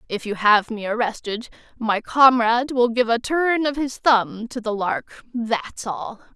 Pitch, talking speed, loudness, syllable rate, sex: 230 Hz, 180 wpm, -21 LUFS, 4.1 syllables/s, female